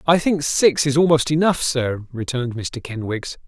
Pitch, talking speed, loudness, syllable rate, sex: 140 Hz, 175 wpm, -20 LUFS, 4.7 syllables/s, male